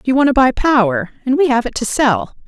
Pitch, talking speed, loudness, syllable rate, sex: 245 Hz, 265 wpm, -15 LUFS, 5.7 syllables/s, female